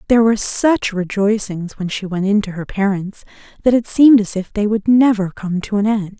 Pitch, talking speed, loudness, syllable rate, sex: 205 Hz, 225 wpm, -16 LUFS, 5.4 syllables/s, female